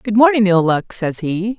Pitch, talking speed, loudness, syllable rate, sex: 205 Hz, 225 wpm, -16 LUFS, 4.5 syllables/s, female